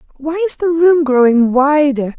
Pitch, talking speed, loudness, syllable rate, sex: 290 Hz, 165 wpm, -13 LUFS, 4.5 syllables/s, female